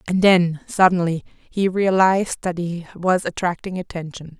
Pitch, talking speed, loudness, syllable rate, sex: 180 Hz, 135 wpm, -20 LUFS, 4.5 syllables/s, female